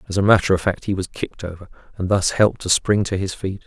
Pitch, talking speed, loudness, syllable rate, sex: 95 Hz, 280 wpm, -20 LUFS, 6.6 syllables/s, male